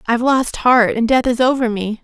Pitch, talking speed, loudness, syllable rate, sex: 240 Hz, 235 wpm, -15 LUFS, 5.4 syllables/s, female